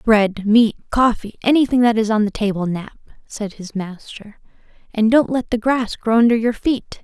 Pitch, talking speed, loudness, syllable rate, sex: 225 Hz, 190 wpm, -18 LUFS, 4.6 syllables/s, female